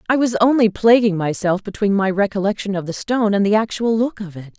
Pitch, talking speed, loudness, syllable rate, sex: 205 Hz, 225 wpm, -18 LUFS, 6.0 syllables/s, female